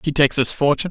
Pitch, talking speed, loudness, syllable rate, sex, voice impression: 145 Hz, 265 wpm, -18 LUFS, 8.1 syllables/s, male, masculine, adult-like, tensed, powerful, slightly bright, slightly clear, cool, intellectual, calm, friendly, wild, lively, light